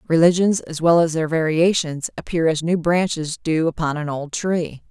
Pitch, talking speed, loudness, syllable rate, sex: 165 Hz, 185 wpm, -20 LUFS, 4.8 syllables/s, female